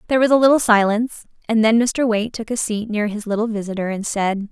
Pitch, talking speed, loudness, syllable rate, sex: 220 Hz, 240 wpm, -18 LUFS, 6.4 syllables/s, female